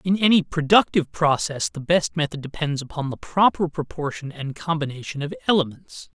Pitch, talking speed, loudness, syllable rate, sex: 150 Hz, 155 wpm, -22 LUFS, 5.5 syllables/s, male